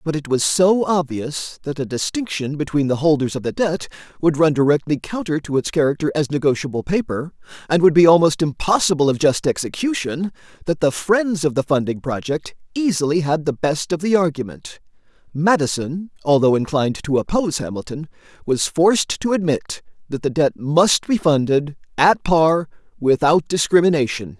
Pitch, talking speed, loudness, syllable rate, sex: 155 Hz, 160 wpm, -19 LUFS, 5.2 syllables/s, male